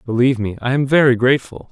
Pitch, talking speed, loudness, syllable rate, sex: 125 Hz, 210 wpm, -16 LUFS, 7.0 syllables/s, male